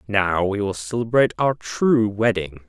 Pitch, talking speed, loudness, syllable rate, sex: 105 Hz, 155 wpm, -21 LUFS, 4.5 syllables/s, male